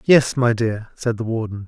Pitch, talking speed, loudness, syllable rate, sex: 115 Hz, 215 wpm, -20 LUFS, 4.6 syllables/s, male